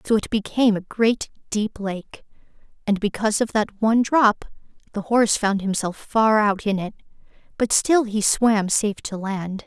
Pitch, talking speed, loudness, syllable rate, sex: 210 Hz, 175 wpm, -21 LUFS, 4.7 syllables/s, female